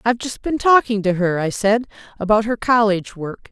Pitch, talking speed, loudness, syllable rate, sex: 215 Hz, 205 wpm, -18 LUFS, 5.5 syllables/s, female